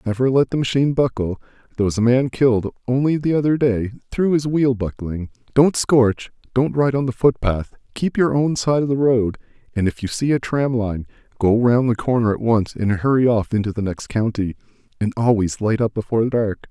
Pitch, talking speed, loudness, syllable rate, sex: 120 Hz, 200 wpm, -19 LUFS, 5.4 syllables/s, male